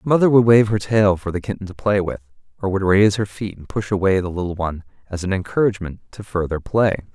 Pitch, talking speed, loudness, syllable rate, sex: 100 Hz, 245 wpm, -19 LUFS, 6.3 syllables/s, male